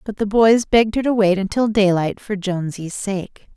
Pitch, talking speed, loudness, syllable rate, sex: 205 Hz, 200 wpm, -18 LUFS, 4.9 syllables/s, female